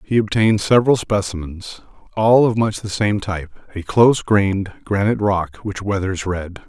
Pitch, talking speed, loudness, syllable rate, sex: 100 Hz, 160 wpm, -18 LUFS, 5.0 syllables/s, male